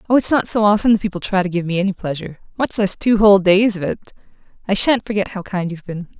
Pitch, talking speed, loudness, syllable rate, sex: 195 Hz, 250 wpm, -17 LUFS, 6.9 syllables/s, female